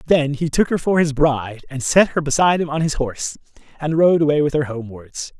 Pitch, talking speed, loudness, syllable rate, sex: 145 Hz, 235 wpm, -18 LUFS, 5.9 syllables/s, male